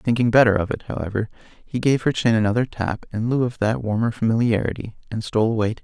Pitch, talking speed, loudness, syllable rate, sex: 115 Hz, 225 wpm, -21 LUFS, 6.5 syllables/s, male